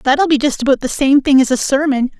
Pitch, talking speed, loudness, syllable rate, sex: 270 Hz, 300 wpm, -14 LUFS, 6.2 syllables/s, female